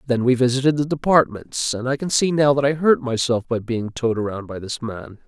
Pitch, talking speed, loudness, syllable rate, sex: 130 Hz, 240 wpm, -20 LUFS, 5.6 syllables/s, male